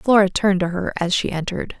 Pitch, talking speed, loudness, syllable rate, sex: 190 Hz, 235 wpm, -20 LUFS, 6.4 syllables/s, female